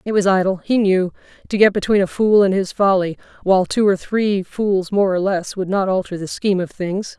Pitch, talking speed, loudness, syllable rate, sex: 190 Hz, 235 wpm, -18 LUFS, 5.3 syllables/s, female